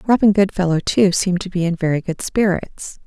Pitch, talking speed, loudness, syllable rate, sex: 185 Hz, 195 wpm, -18 LUFS, 5.6 syllables/s, female